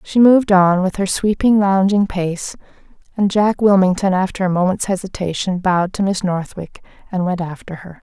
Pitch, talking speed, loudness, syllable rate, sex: 190 Hz, 170 wpm, -16 LUFS, 5.1 syllables/s, female